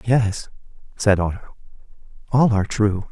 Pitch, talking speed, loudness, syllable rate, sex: 105 Hz, 115 wpm, -20 LUFS, 4.4 syllables/s, male